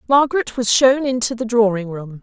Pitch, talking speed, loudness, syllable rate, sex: 235 Hz, 190 wpm, -17 LUFS, 5.4 syllables/s, female